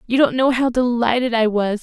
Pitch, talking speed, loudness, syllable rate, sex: 240 Hz, 230 wpm, -18 LUFS, 5.4 syllables/s, female